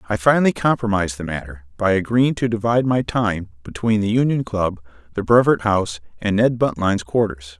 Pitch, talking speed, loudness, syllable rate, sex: 105 Hz, 175 wpm, -19 LUFS, 5.7 syllables/s, male